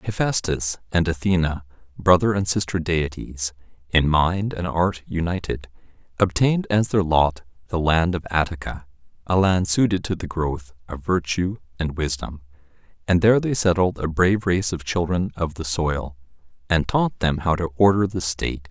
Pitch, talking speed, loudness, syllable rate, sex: 85 Hz, 160 wpm, -22 LUFS, 4.8 syllables/s, male